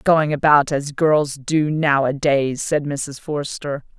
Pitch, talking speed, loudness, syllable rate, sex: 145 Hz, 135 wpm, -19 LUFS, 3.5 syllables/s, female